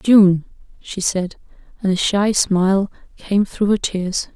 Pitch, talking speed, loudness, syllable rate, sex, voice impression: 195 Hz, 150 wpm, -18 LUFS, 3.7 syllables/s, female, gender-neutral, slightly young, relaxed, weak, dark, slightly soft, raspy, intellectual, calm, friendly, reassuring, slightly unique, kind, modest